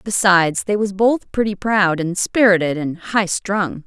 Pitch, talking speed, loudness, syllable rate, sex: 195 Hz, 170 wpm, -17 LUFS, 4.2 syllables/s, female